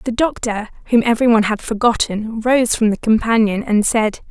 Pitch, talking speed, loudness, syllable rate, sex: 225 Hz, 180 wpm, -16 LUFS, 5.3 syllables/s, female